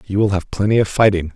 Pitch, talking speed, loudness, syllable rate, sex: 100 Hz, 265 wpm, -17 LUFS, 6.7 syllables/s, male